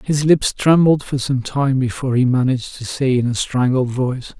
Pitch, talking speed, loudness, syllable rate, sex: 130 Hz, 205 wpm, -17 LUFS, 5.1 syllables/s, male